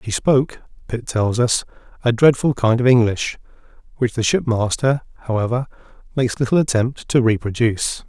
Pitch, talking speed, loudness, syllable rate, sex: 120 Hz, 140 wpm, -19 LUFS, 5.3 syllables/s, male